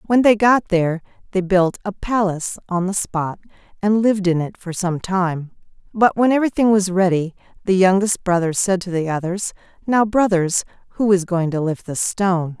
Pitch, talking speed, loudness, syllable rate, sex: 190 Hz, 185 wpm, -19 LUFS, 5.1 syllables/s, female